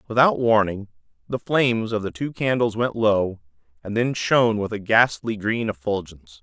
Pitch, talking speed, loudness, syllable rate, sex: 110 Hz, 170 wpm, -22 LUFS, 5.0 syllables/s, male